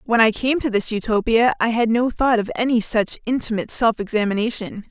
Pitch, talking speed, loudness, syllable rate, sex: 225 Hz, 195 wpm, -20 LUFS, 5.7 syllables/s, female